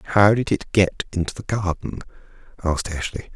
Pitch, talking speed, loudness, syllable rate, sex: 95 Hz, 160 wpm, -22 LUFS, 5.8 syllables/s, male